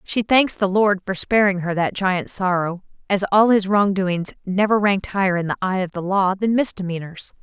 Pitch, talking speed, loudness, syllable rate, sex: 195 Hz, 210 wpm, -19 LUFS, 5.1 syllables/s, female